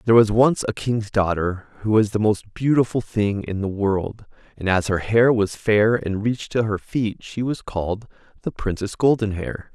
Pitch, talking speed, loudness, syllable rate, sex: 105 Hz, 195 wpm, -21 LUFS, 4.7 syllables/s, male